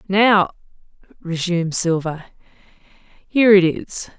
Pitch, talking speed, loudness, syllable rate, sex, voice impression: 185 Hz, 85 wpm, -18 LUFS, 4.2 syllables/s, female, feminine, adult-like, relaxed, slightly powerful, soft, slightly muffled, intellectual, reassuring, elegant, lively, slightly sharp